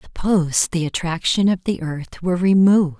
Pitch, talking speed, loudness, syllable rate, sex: 175 Hz, 160 wpm, -19 LUFS, 5.2 syllables/s, female